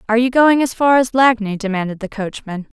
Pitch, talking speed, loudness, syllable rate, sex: 230 Hz, 215 wpm, -16 LUFS, 6.0 syllables/s, female